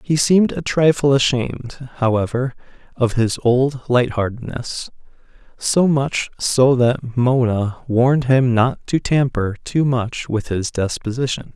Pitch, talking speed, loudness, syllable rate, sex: 125 Hz, 130 wpm, -18 LUFS, 4.0 syllables/s, male